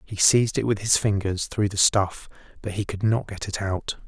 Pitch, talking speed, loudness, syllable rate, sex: 100 Hz, 235 wpm, -23 LUFS, 5.0 syllables/s, male